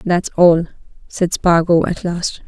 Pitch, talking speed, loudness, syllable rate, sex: 175 Hz, 145 wpm, -16 LUFS, 3.6 syllables/s, female